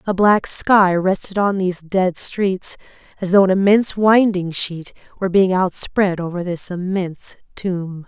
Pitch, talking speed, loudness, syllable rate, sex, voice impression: 185 Hz, 155 wpm, -18 LUFS, 4.4 syllables/s, female, very feminine, adult-like, thin, tensed, slightly powerful, bright, slightly hard, clear, fluent, slightly raspy, cool, very intellectual, refreshing, sincere, calm, friendly, very reassuring, slightly unique, elegant, very wild, sweet, lively, strict, slightly intense